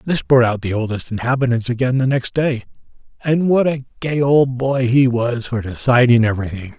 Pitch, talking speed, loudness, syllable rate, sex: 125 Hz, 175 wpm, -17 LUFS, 5.2 syllables/s, male